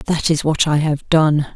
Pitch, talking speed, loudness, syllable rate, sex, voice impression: 155 Hz, 230 wpm, -16 LUFS, 4.6 syllables/s, female, very feminine, slightly gender-neutral, very adult-like, very middle-aged, slightly thin, tensed, slightly powerful, slightly bright, hard, clear, fluent, slightly raspy, slightly cool, very intellectual, slightly refreshing, very sincere, very calm, friendly, reassuring, slightly unique, very elegant, slightly wild, slightly sweet, slightly lively, very kind, slightly intense, slightly modest, slightly light